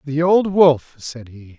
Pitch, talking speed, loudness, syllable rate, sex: 145 Hz, 190 wpm, -15 LUFS, 3.5 syllables/s, male